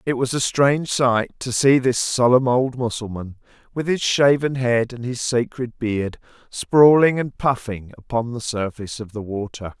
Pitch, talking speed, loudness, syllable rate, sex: 120 Hz, 170 wpm, -20 LUFS, 4.5 syllables/s, male